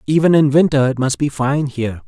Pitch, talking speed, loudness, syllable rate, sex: 135 Hz, 230 wpm, -16 LUFS, 5.9 syllables/s, male